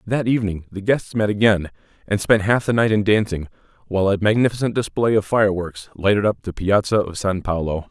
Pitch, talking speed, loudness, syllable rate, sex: 100 Hz, 195 wpm, -20 LUFS, 5.8 syllables/s, male